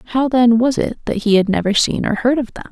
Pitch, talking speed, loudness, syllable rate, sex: 235 Hz, 290 wpm, -16 LUFS, 6.1 syllables/s, female